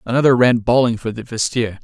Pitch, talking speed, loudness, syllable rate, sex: 120 Hz, 195 wpm, -16 LUFS, 6.4 syllables/s, male